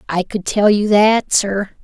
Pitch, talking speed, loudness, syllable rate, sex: 205 Hz, 195 wpm, -15 LUFS, 3.7 syllables/s, female